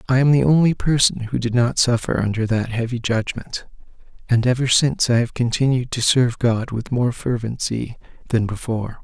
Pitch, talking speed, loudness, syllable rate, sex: 120 Hz, 180 wpm, -19 LUFS, 5.3 syllables/s, male